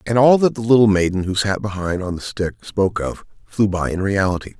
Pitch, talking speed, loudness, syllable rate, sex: 100 Hz, 235 wpm, -18 LUFS, 5.6 syllables/s, male